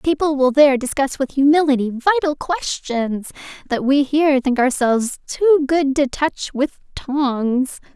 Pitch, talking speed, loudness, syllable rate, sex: 280 Hz, 145 wpm, -18 LUFS, 4.3 syllables/s, female